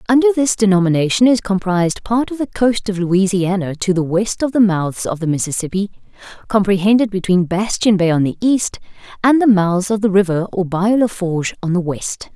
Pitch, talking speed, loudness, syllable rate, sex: 200 Hz, 195 wpm, -16 LUFS, 5.4 syllables/s, female